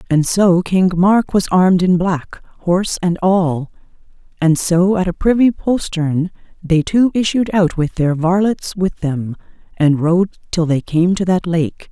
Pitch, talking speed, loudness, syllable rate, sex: 180 Hz, 170 wpm, -16 LUFS, 4.1 syllables/s, female